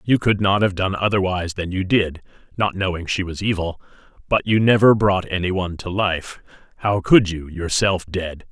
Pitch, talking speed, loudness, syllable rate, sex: 95 Hz, 185 wpm, -20 LUFS, 5.1 syllables/s, male